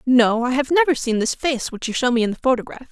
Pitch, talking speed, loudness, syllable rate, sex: 255 Hz, 290 wpm, -19 LUFS, 6.3 syllables/s, female